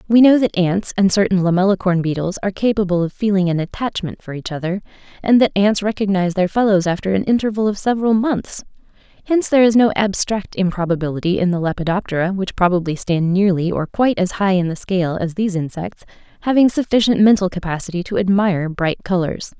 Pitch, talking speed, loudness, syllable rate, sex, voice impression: 190 Hz, 185 wpm, -17 LUFS, 6.2 syllables/s, female, feminine, adult-like, fluent, slightly sincere, calm, slightly friendly, slightly reassuring, slightly kind